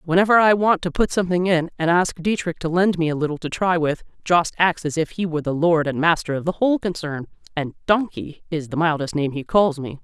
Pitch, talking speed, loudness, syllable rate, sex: 165 Hz, 245 wpm, -20 LUFS, 5.8 syllables/s, female